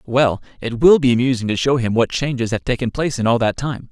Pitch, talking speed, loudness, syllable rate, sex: 120 Hz, 260 wpm, -18 LUFS, 6.0 syllables/s, male